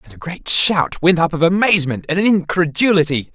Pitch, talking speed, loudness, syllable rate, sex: 170 Hz, 180 wpm, -16 LUFS, 5.3 syllables/s, male